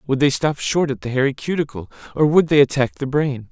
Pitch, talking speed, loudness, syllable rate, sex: 140 Hz, 240 wpm, -19 LUFS, 5.6 syllables/s, male